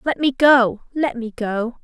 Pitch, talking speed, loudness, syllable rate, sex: 245 Hz, 195 wpm, -18 LUFS, 3.9 syllables/s, female